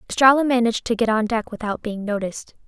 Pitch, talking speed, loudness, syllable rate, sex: 225 Hz, 200 wpm, -20 LUFS, 6.7 syllables/s, female